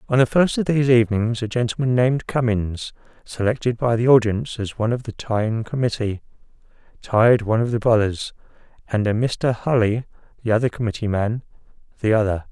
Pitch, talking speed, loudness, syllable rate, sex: 115 Hz, 170 wpm, -20 LUFS, 5.9 syllables/s, male